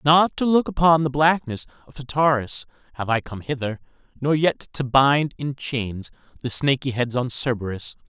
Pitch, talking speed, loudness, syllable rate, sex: 135 Hz, 170 wpm, -22 LUFS, 4.8 syllables/s, male